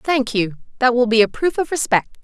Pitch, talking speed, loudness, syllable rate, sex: 250 Hz, 240 wpm, -18 LUFS, 5.4 syllables/s, female